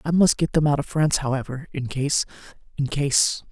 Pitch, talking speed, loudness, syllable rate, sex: 145 Hz, 190 wpm, -22 LUFS, 5.4 syllables/s, female